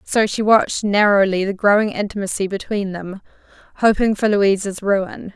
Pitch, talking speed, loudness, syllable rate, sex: 200 Hz, 145 wpm, -18 LUFS, 4.9 syllables/s, female